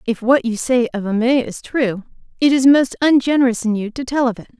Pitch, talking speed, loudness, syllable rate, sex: 245 Hz, 235 wpm, -17 LUFS, 5.9 syllables/s, female